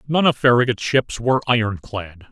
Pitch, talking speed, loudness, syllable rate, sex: 120 Hz, 155 wpm, -18 LUFS, 5.2 syllables/s, male